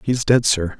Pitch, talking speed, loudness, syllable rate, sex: 110 Hz, 225 wpm, -17 LUFS, 4.4 syllables/s, male